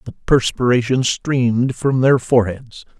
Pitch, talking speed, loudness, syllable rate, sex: 125 Hz, 120 wpm, -17 LUFS, 4.6 syllables/s, male